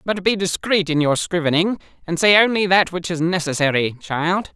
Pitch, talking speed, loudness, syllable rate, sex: 175 Hz, 185 wpm, -18 LUFS, 5.1 syllables/s, male